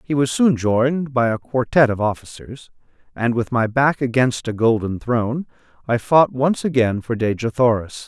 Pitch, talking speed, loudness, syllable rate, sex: 125 Hz, 180 wpm, -19 LUFS, 4.8 syllables/s, male